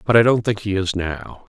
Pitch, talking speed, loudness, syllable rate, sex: 100 Hz, 270 wpm, -19 LUFS, 5.1 syllables/s, male